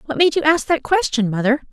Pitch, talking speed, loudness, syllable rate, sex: 285 Hz, 245 wpm, -17 LUFS, 5.6 syllables/s, female